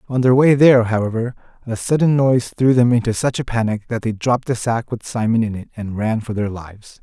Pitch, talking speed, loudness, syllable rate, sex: 115 Hz, 240 wpm, -18 LUFS, 5.9 syllables/s, male